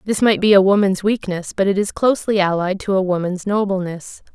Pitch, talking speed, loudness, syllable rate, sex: 195 Hz, 205 wpm, -17 LUFS, 5.6 syllables/s, female